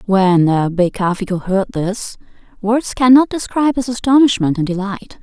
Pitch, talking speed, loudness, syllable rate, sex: 210 Hz, 125 wpm, -15 LUFS, 4.5 syllables/s, female